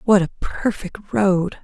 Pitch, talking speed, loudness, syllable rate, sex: 190 Hz, 145 wpm, -20 LUFS, 4.1 syllables/s, female